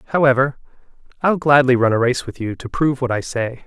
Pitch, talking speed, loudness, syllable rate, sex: 130 Hz, 215 wpm, -18 LUFS, 5.7 syllables/s, male